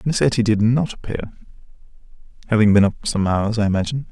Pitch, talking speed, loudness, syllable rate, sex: 110 Hz, 175 wpm, -19 LUFS, 6.7 syllables/s, male